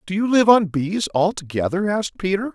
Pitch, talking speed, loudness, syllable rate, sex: 190 Hz, 190 wpm, -19 LUFS, 5.7 syllables/s, male